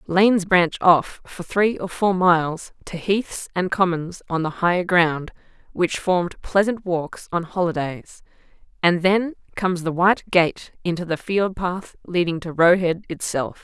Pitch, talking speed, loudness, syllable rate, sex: 175 Hz, 165 wpm, -21 LUFS, 4.3 syllables/s, female